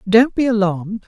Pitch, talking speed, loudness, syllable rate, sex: 215 Hz, 165 wpm, -17 LUFS, 5.3 syllables/s, female